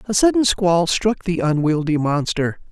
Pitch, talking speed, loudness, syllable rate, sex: 175 Hz, 155 wpm, -18 LUFS, 4.4 syllables/s, male